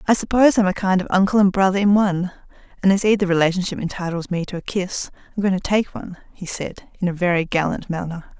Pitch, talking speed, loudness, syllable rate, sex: 185 Hz, 230 wpm, -20 LUFS, 6.6 syllables/s, female